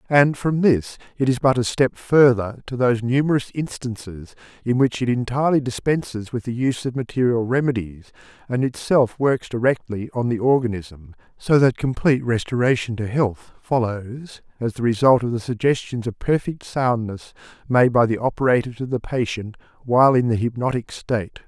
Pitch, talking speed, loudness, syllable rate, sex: 120 Hz, 165 wpm, -21 LUFS, 5.2 syllables/s, male